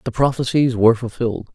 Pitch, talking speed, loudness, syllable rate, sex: 120 Hz, 155 wpm, -18 LUFS, 6.4 syllables/s, male